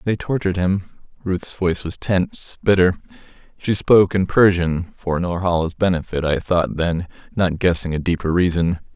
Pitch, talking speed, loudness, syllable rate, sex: 90 Hz, 145 wpm, -19 LUFS, 5.0 syllables/s, male